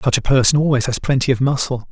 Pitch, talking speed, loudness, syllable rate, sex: 130 Hz, 250 wpm, -16 LUFS, 6.6 syllables/s, male